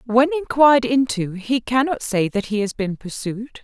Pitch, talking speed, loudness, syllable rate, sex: 235 Hz, 180 wpm, -20 LUFS, 4.8 syllables/s, female